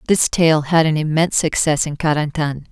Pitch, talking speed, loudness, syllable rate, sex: 155 Hz, 175 wpm, -17 LUFS, 5.2 syllables/s, female